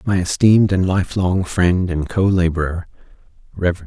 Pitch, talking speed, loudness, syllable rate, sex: 90 Hz, 140 wpm, -17 LUFS, 4.5 syllables/s, male